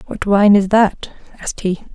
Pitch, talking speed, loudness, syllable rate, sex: 200 Hz, 185 wpm, -15 LUFS, 4.9 syllables/s, female